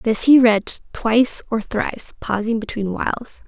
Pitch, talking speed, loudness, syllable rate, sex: 225 Hz, 155 wpm, -19 LUFS, 4.6 syllables/s, female